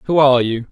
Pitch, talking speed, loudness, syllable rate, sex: 130 Hz, 250 wpm, -14 LUFS, 6.0 syllables/s, male